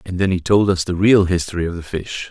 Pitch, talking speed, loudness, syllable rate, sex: 90 Hz, 285 wpm, -18 LUFS, 5.9 syllables/s, male